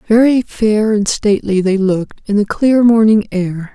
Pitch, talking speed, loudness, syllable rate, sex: 210 Hz, 175 wpm, -13 LUFS, 4.5 syllables/s, female